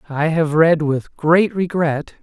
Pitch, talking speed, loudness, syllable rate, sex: 160 Hz, 160 wpm, -17 LUFS, 3.6 syllables/s, male